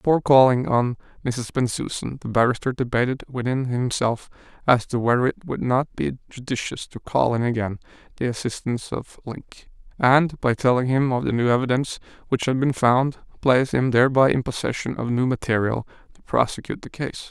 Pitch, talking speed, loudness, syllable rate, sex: 125 Hz, 175 wpm, -22 LUFS, 5.5 syllables/s, male